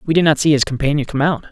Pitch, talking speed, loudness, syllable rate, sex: 145 Hz, 320 wpm, -16 LUFS, 6.9 syllables/s, male